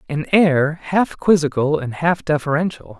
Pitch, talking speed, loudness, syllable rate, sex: 155 Hz, 140 wpm, -18 LUFS, 4.3 syllables/s, male